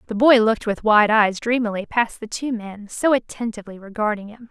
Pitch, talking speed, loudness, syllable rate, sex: 220 Hz, 200 wpm, -20 LUFS, 5.5 syllables/s, female